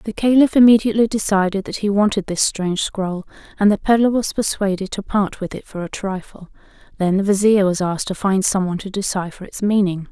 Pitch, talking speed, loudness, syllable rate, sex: 200 Hz, 210 wpm, -18 LUFS, 5.8 syllables/s, female